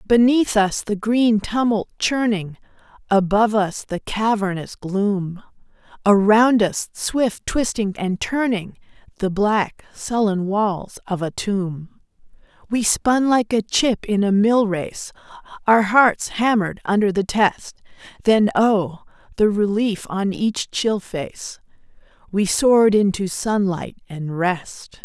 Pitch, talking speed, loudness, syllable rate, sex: 205 Hz, 120 wpm, -19 LUFS, 3.5 syllables/s, female